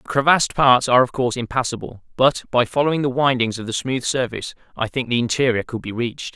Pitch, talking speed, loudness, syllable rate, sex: 125 Hz, 215 wpm, -19 LUFS, 6.5 syllables/s, male